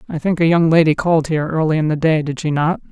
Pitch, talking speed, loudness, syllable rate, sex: 160 Hz, 290 wpm, -16 LUFS, 6.8 syllables/s, female